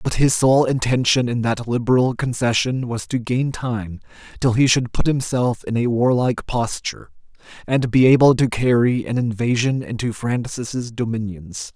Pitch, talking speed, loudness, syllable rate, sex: 120 Hz, 160 wpm, -19 LUFS, 4.7 syllables/s, male